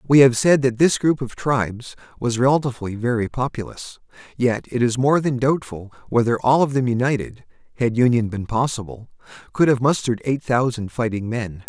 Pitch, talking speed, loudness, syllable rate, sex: 120 Hz, 175 wpm, -20 LUFS, 5.3 syllables/s, male